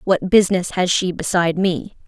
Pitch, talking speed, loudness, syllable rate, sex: 180 Hz, 175 wpm, -18 LUFS, 5.3 syllables/s, female